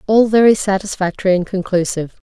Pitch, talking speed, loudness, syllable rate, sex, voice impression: 195 Hz, 130 wpm, -16 LUFS, 6.4 syllables/s, female, very feminine, slightly young, slightly thin, relaxed, slightly weak, slightly dark, soft, slightly clear, slightly fluent, cute, intellectual, slightly refreshing, sincere, calm, very friendly, very reassuring, slightly unique, elegant, slightly wild, sweet, lively, kind, slightly intense, slightly sharp, light